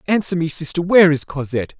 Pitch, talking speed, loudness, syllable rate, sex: 160 Hz, 200 wpm, -17 LUFS, 6.7 syllables/s, male